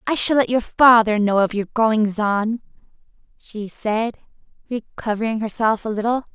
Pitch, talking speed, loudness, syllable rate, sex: 220 Hz, 150 wpm, -19 LUFS, 4.6 syllables/s, female